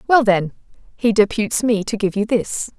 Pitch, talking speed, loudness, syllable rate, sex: 215 Hz, 195 wpm, -18 LUFS, 5.1 syllables/s, female